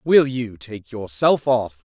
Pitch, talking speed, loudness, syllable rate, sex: 120 Hz, 155 wpm, -20 LUFS, 3.5 syllables/s, male